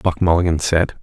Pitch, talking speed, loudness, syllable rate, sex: 85 Hz, 175 wpm, -17 LUFS, 5.3 syllables/s, male